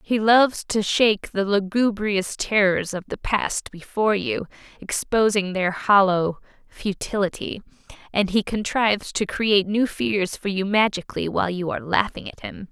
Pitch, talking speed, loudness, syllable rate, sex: 200 Hz, 150 wpm, -22 LUFS, 4.7 syllables/s, female